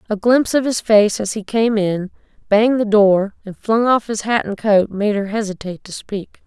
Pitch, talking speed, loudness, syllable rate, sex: 210 Hz, 225 wpm, -17 LUFS, 5.0 syllables/s, female